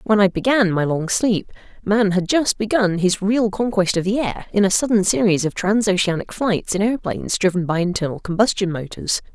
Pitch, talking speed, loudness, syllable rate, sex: 195 Hz, 195 wpm, -19 LUFS, 5.2 syllables/s, female